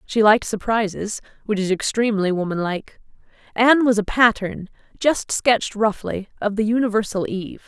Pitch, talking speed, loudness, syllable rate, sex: 215 Hz, 135 wpm, -20 LUFS, 5.4 syllables/s, female